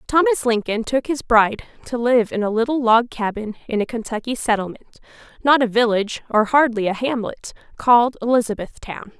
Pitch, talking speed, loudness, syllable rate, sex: 230 Hz, 150 wpm, -19 LUFS, 5.5 syllables/s, female